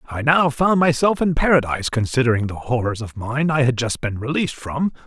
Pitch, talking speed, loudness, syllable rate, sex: 135 Hz, 200 wpm, -19 LUFS, 5.7 syllables/s, male